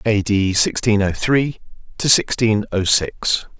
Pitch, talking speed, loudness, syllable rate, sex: 105 Hz, 150 wpm, -17 LUFS, 3.7 syllables/s, male